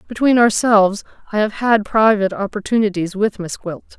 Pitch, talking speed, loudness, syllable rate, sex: 210 Hz, 150 wpm, -17 LUFS, 5.5 syllables/s, female